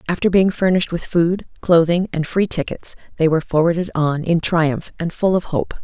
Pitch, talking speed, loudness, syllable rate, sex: 170 Hz, 195 wpm, -18 LUFS, 5.2 syllables/s, female